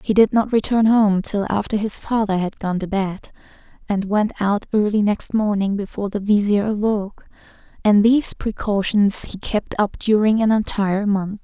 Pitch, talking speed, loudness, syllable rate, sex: 205 Hz, 175 wpm, -19 LUFS, 4.9 syllables/s, female